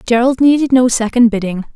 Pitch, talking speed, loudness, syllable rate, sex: 240 Hz, 170 wpm, -13 LUFS, 5.8 syllables/s, female